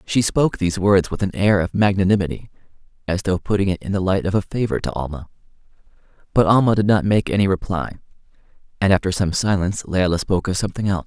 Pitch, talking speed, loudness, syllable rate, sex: 95 Hz, 200 wpm, -19 LUFS, 6.7 syllables/s, male